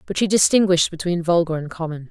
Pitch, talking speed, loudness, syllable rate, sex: 170 Hz, 200 wpm, -19 LUFS, 6.6 syllables/s, female